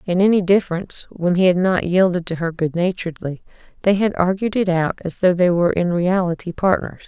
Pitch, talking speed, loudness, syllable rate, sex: 180 Hz, 205 wpm, -19 LUFS, 5.7 syllables/s, female